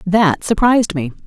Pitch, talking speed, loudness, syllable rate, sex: 195 Hz, 140 wpm, -15 LUFS, 4.9 syllables/s, female